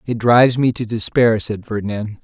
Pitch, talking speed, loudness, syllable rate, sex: 115 Hz, 190 wpm, -17 LUFS, 5.0 syllables/s, male